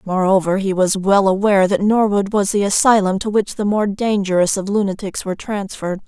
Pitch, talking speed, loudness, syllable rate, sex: 200 Hz, 190 wpm, -17 LUFS, 5.6 syllables/s, female